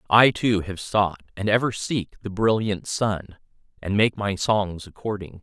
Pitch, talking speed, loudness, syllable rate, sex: 100 Hz, 165 wpm, -23 LUFS, 4.1 syllables/s, male